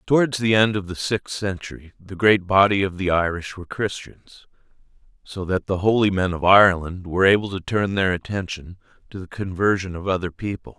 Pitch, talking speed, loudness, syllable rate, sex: 95 Hz, 190 wpm, -21 LUFS, 5.5 syllables/s, male